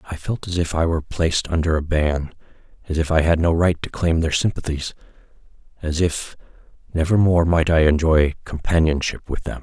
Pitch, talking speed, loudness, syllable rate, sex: 80 Hz, 175 wpm, -20 LUFS, 5.5 syllables/s, male